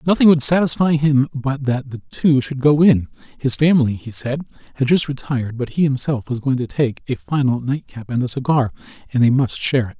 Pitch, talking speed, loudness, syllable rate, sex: 135 Hz, 215 wpm, -18 LUFS, 5.6 syllables/s, male